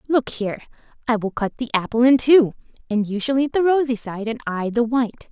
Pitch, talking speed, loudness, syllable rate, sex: 240 Hz, 225 wpm, -20 LUFS, 5.7 syllables/s, female